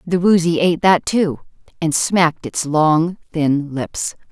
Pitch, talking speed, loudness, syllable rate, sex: 165 Hz, 155 wpm, -17 LUFS, 3.9 syllables/s, female